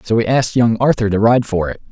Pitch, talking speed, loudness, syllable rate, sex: 110 Hz, 280 wpm, -15 LUFS, 6.4 syllables/s, male